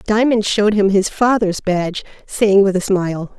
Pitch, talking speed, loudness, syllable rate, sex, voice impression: 200 Hz, 175 wpm, -16 LUFS, 5.0 syllables/s, female, feminine, slightly adult-like, slightly clear, fluent, slightly refreshing, slightly friendly